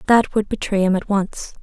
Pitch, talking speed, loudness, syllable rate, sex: 200 Hz, 220 wpm, -19 LUFS, 5.1 syllables/s, female